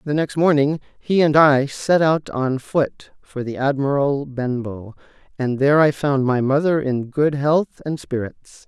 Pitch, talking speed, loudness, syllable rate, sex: 140 Hz, 175 wpm, -19 LUFS, 4.1 syllables/s, male